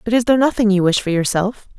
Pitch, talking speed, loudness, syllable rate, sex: 210 Hz, 270 wpm, -16 LUFS, 6.8 syllables/s, female